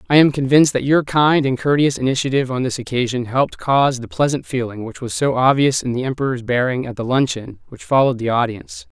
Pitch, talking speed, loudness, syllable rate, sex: 130 Hz, 215 wpm, -18 LUFS, 6.3 syllables/s, male